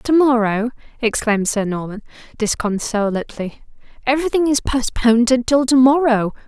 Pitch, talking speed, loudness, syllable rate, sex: 240 Hz, 110 wpm, -17 LUFS, 5.3 syllables/s, female